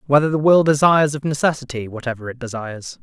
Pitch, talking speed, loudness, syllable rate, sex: 135 Hz, 180 wpm, -18 LUFS, 6.6 syllables/s, male